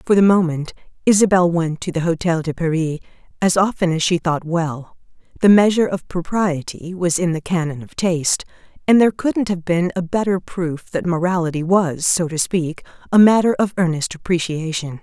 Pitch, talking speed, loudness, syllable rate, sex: 175 Hz, 180 wpm, -18 LUFS, 5.2 syllables/s, female